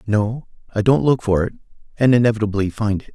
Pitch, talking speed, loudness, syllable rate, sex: 110 Hz, 155 wpm, -19 LUFS, 5.9 syllables/s, male